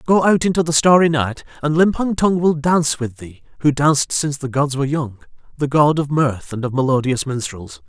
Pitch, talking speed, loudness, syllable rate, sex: 145 Hz, 215 wpm, -17 LUFS, 5.5 syllables/s, male